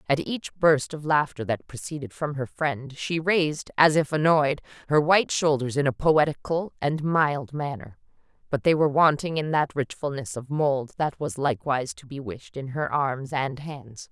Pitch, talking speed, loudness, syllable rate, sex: 145 Hz, 185 wpm, -25 LUFS, 4.7 syllables/s, female